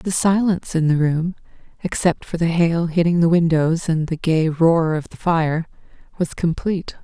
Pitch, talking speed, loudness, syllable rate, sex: 165 Hz, 180 wpm, -19 LUFS, 4.7 syllables/s, female